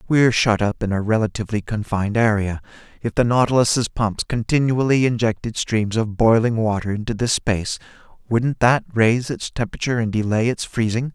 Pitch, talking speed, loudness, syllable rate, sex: 115 Hz, 160 wpm, -20 LUFS, 5.7 syllables/s, male